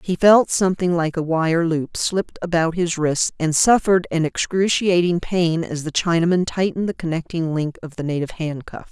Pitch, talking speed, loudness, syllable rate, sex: 170 Hz, 180 wpm, -20 LUFS, 5.2 syllables/s, female